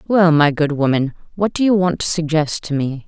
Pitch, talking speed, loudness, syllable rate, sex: 160 Hz, 235 wpm, -17 LUFS, 5.2 syllables/s, female